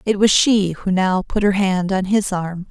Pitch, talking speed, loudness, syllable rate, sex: 190 Hz, 245 wpm, -17 LUFS, 4.2 syllables/s, female